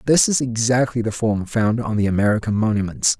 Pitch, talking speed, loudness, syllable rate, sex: 115 Hz, 190 wpm, -19 LUFS, 5.6 syllables/s, male